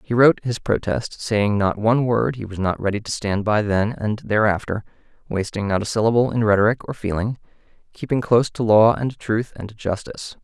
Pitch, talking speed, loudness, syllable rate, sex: 110 Hz, 195 wpm, -20 LUFS, 5.4 syllables/s, male